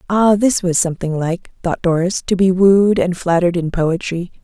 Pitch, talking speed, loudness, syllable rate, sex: 180 Hz, 190 wpm, -16 LUFS, 5.0 syllables/s, female